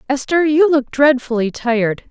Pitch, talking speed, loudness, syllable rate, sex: 265 Hz, 145 wpm, -15 LUFS, 4.8 syllables/s, female